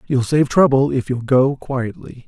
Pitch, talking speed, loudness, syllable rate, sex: 130 Hz, 185 wpm, -17 LUFS, 4.4 syllables/s, male